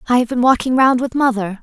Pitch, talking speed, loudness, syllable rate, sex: 245 Hz, 260 wpm, -15 LUFS, 6.3 syllables/s, female